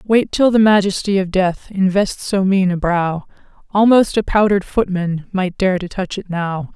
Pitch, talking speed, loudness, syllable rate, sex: 190 Hz, 185 wpm, -16 LUFS, 4.6 syllables/s, female